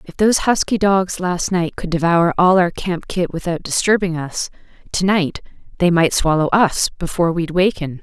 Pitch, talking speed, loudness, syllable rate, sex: 175 Hz, 180 wpm, -17 LUFS, 4.9 syllables/s, female